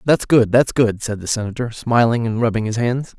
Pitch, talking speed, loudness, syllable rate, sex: 115 Hz, 225 wpm, -18 LUFS, 5.3 syllables/s, male